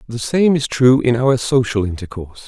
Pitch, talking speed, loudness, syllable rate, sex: 125 Hz, 195 wpm, -16 LUFS, 5.3 syllables/s, male